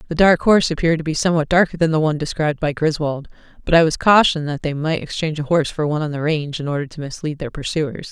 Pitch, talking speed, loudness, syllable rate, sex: 155 Hz, 260 wpm, -18 LUFS, 7.3 syllables/s, female